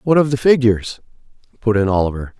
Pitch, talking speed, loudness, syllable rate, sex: 115 Hz, 175 wpm, -16 LUFS, 6.5 syllables/s, male